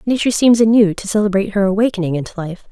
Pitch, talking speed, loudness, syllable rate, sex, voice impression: 205 Hz, 200 wpm, -15 LUFS, 7.4 syllables/s, female, feminine, slightly adult-like, fluent, slightly intellectual, slightly reassuring